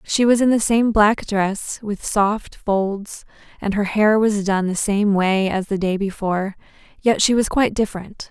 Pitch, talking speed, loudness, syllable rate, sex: 205 Hz, 195 wpm, -19 LUFS, 4.3 syllables/s, female